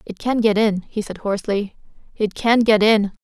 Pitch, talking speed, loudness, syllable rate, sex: 210 Hz, 205 wpm, -19 LUFS, 4.9 syllables/s, female